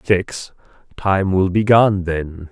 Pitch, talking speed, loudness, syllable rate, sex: 95 Hz, 145 wpm, -17 LUFS, 3.0 syllables/s, male